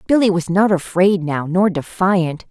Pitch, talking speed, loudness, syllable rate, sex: 185 Hz, 170 wpm, -17 LUFS, 4.3 syllables/s, female